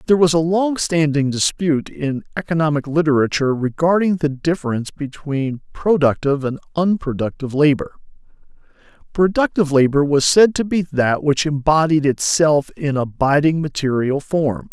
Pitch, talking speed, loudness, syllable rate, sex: 150 Hz, 120 wpm, -18 LUFS, 5.2 syllables/s, male